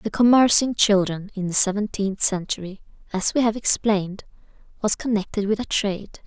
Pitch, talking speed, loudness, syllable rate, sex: 205 Hz, 165 wpm, -21 LUFS, 5.4 syllables/s, female